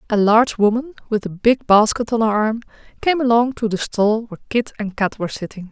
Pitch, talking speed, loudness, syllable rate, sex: 220 Hz, 220 wpm, -18 LUFS, 5.8 syllables/s, female